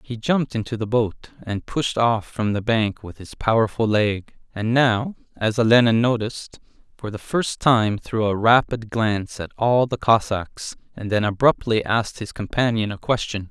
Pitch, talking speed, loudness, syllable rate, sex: 110 Hz, 180 wpm, -21 LUFS, 4.6 syllables/s, male